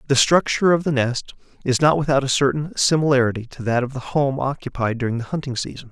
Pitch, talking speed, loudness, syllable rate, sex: 135 Hz, 215 wpm, -20 LUFS, 6.3 syllables/s, male